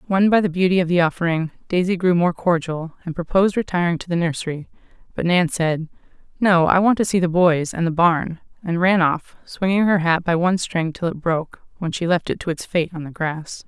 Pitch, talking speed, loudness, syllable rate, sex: 175 Hz, 230 wpm, -20 LUFS, 5.6 syllables/s, female